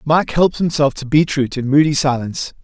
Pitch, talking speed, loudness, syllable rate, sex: 145 Hz, 180 wpm, -16 LUFS, 5.7 syllables/s, male